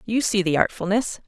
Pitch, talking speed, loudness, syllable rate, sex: 200 Hz, 190 wpm, -22 LUFS, 5.3 syllables/s, female